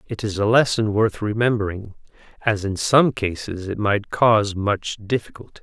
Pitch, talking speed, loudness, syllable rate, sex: 105 Hz, 160 wpm, -20 LUFS, 4.8 syllables/s, male